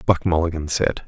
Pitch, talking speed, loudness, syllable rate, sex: 80 Hz, 165 wpm, -21 LUFS, 5.3 syllables/s, male